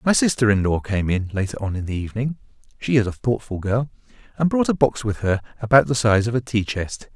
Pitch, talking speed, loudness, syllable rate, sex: 115 Hz, 245 wpm, -21 LUFS, 5.4 syllables/s, male